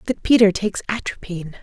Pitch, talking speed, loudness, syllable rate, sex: 200 Hz, 150 wpm, -19 LUFS, 6.7 syllables/s, female